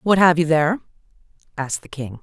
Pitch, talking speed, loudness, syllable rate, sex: 160 Hz, 190 wpm, -20 LUFS, 6.4 syllables/s, female